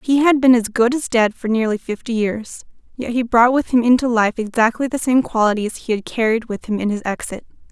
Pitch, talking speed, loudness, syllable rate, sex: 235 Hz, 235 wpm, -18 LUFS, 5.6 syllables/s, female